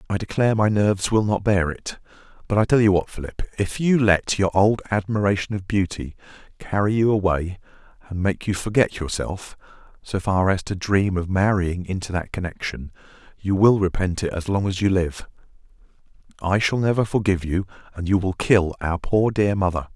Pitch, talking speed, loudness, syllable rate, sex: 95 Hz, 185 wpm, -22 LUFS, 5.3 syllables/s, male